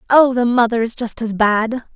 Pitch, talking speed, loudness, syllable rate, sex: 235 Hz, 215 wpm, -16 LUFS, 4.8 syllables/s, female